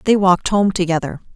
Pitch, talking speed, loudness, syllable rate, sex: 185 Hz, 175 wpm, -16 LUFS, 6.3 syllables/s, female